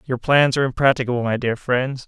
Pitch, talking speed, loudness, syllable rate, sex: 125 Hz, 200 wpm, -19 LUFS, 6.1 syllables/s, male